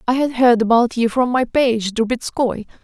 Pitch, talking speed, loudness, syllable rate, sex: 240 Hz, 190 wpm, -17 LUFS, 4.7 syllables/s, female